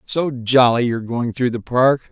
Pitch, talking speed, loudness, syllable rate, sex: 125 Hz, 200 wpm, -18 LUFS, 4.7 syllables/s, male